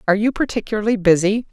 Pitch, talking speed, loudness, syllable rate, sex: 210 Hz, 160 wpm, -18 LUFS, 7.4 syllables/s, female